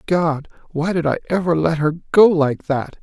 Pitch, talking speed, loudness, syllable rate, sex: 160 Hz, 180 wpm, -18 LUFS, 4.4 syllables/s, male